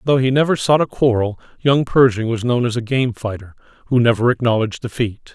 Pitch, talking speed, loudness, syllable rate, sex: 120 Hz, 200 wpm, -17 LUFS, 5.8 syllables/s, male